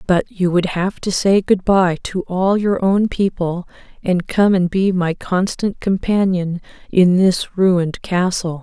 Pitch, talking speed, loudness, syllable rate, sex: 185 Hz, 165 wpm, -17 LUFS, 3.9 syllables/s, female